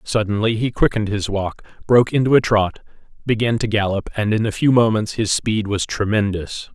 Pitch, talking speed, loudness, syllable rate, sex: 110 Hz, 185 wpm, -19 LUFS, 5.4 syllables/s, male